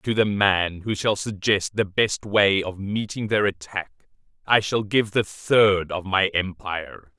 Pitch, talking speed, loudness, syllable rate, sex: 100 Hz, 175 wpm, -22 LUFS, 3.9 syllables/s, male